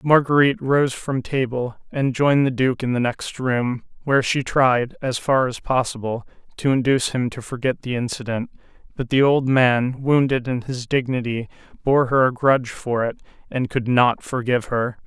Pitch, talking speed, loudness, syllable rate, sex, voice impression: 130 Hz, 180 wpm, -21 LUFS, 4.9 syllables/s, male, very masculine, old, slightly thick, slightly tensed, slightly weak, slightly bright, soft, slightly muffled, slightly halting, slightly raspy, slightly cool, intellectual, slightly refreshing, sincere, calm, mature, friendly, slightly reassuring, unique, slightly elegant, wild, slightly sweet, lively, kind, modest